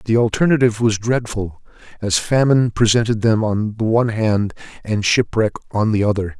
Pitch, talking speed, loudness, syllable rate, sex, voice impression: 110 Hz, 160 wpm, -18 LUFS, 5.4 syllables/s, male, masculine, middle-aged, tensed, slightly muffled, slightly halting, sincere, calm, mature, friendly, reassuring, wild, slightly lively, kind, slightly strict